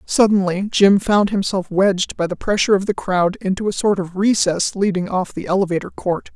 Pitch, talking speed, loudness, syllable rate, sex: 190 Hz, 200 wpm, -18 LUFS, 5.4 syllables/s, female